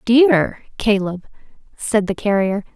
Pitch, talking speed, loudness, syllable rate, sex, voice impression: 210 Hz, 110 wpm, -18 LUFS, 3.7 syllables/s, female, very feminine, young, very thin, slightly tensed, slightly weak, very bright, soft, very clear, very fluent, very cute, intellectual, very refreshing, sincere, calm, very friendly, very reassuring, very unique, elegant, slightly wild, very sweet, very lively, kind, intense, slightly sharp, light